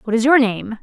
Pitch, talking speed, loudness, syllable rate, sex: 235 Hz, 290 wpm, -15 LUFS, 5.7 syllables/s, female